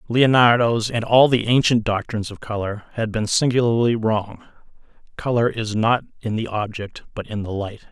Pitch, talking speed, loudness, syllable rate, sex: 115 Hz, 165 wpm, -20 LUFS, 5.0 syllables/s, male